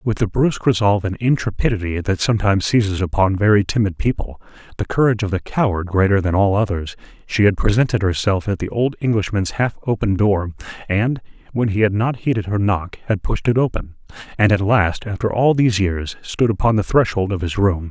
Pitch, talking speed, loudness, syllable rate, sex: 105 Hz, 190 wpm, -18 LUFS, 5.7 syllables/s, male